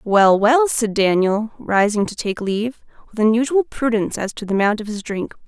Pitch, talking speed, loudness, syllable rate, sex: 220 Hz, 195 wpm, -18 LUFS, 5.3 syllables/s, female